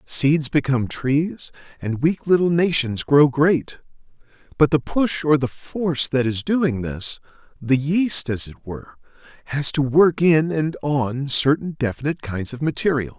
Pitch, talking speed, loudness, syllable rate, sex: 145 Hz, 160 wpm, -20 LUFS, 4.3 syllables/s, male